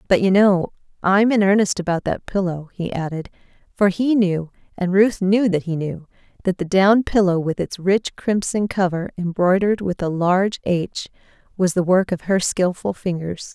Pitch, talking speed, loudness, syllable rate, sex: 190 Hz, 180 wpm, -19 LUFS, 4.8 syllables/s, female